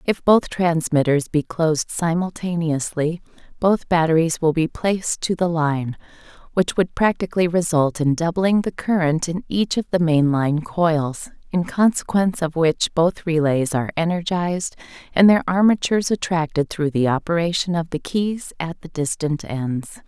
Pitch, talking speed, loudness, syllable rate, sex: 165 Hz, 150 wpm, -20 LUFS, 4.7 syllables/s, female